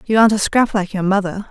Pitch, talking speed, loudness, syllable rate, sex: 200 Hz, 280 wpm, -16 LUFS, 6.5 syllables/s, female